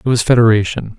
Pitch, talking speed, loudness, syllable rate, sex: 115 Hz, 180 wpm, -13 LUFS, 6.3 syllables/s, male